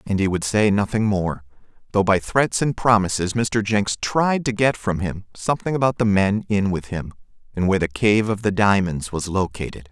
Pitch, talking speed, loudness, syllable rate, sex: 105 Hz, 205 wpm, -21 LUFS, 5.1 syllables/s, male